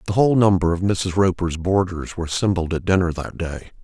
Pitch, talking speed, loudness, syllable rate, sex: 90 Hz, 205 wpm, -20 LUFS, 6.2 syllables/s, male